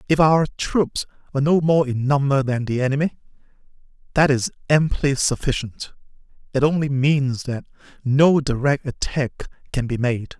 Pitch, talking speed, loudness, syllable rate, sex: 140 Hz, 145 wpm, -20 LUFS, 4.6 syllables/s, male